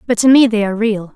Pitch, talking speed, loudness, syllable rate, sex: 220 Hz, 310 wpm, -13 LUFS, 6.9 syllables/s, female